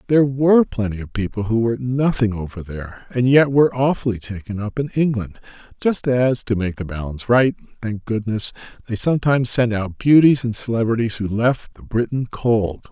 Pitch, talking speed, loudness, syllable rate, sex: 115 Hz, 170 wpm, -19 LUFS, 5.4 syllables/s, male